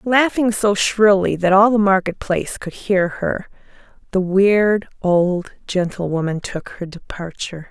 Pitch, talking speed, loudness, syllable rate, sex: 190 Hz, 140 wpm, -18 LUFS, 4.2 syllables/s, female